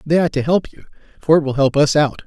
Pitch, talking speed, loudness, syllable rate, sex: 150 Hz, 290 wpm, -16 LUFS, 6.2 syllables/s, male